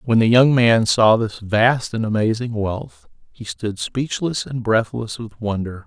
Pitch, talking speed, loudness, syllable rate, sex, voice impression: 110 Hz, 175 wpm, -19 LUFS, 4.0 syllables/s, male, very masculine, very adult-like, middle-aged, very thick, very tensed, very powerful, bright, slightly soft, slightly muffled, slightly fluent, very cool, very intellectual, slightly refreshing, sincere, calm, very mature, friendly, reassuring, very wild, slightly sweet, slightly lively, kind